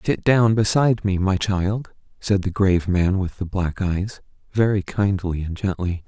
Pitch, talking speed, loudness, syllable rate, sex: 95 Hz, 180 wpm, -21 LUFS, 4.4 syllables/s, male